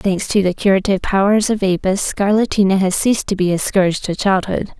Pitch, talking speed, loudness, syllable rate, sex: 195 Hz, 200 wpm, -16 LUFS, 5.7 syllables/s, female